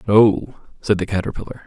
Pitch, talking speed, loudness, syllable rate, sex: 105 Hz, 145 wpm, -19 LUFS, 5.4 syllables/s, male